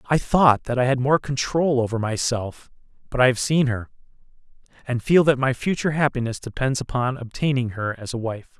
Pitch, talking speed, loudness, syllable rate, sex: 130 Hz, 190 wpm, -22 LUFS, 5.3 syllables/s, male